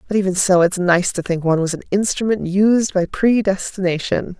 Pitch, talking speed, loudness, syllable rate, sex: 190 Hz, 190 wpm, -17 LUFS, 5.3 syllables/s, female